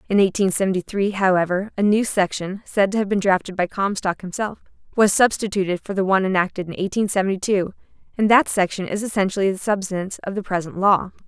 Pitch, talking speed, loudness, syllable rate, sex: 195 Hz, 195 wpm, -21 LUFS, 6.2 syllables/s, female